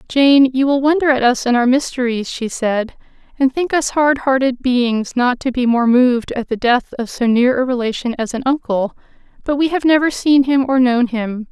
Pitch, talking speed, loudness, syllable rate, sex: 255 Hz, 220 wpm, -16 LUFS, 4.9 syllables/s, female